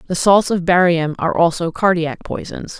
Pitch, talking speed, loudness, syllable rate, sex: 170 Hz, 170 wpm, -16 LUFS, 5.2 syllables/s, female